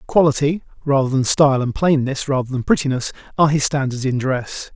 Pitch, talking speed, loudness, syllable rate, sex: 140 Hz, 175 wpm, -18 LUFS, 5.8 syllables/s, male